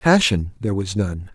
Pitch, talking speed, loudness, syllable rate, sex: 105 Hz, 180 wpm, -21 LUFS, 4.8 syllables/s, male